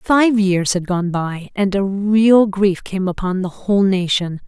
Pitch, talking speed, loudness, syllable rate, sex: 195 Hz, 190 wpm, -17 LUFS, 3.9 syllables/s, female